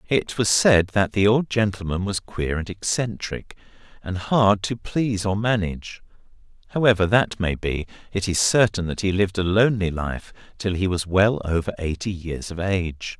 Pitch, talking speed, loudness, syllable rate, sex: 100 Hz, 175 wpm, -22 LUFS, 4.9 syllables/s, male